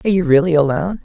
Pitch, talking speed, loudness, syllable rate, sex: 170 Hz, 230 wpm, -15 LUFS, 8.7 syllables/s, female